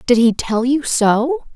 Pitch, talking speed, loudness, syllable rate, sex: 250 Hz, 195 wpm, -16 LUFS, 3.9 syllables/s, female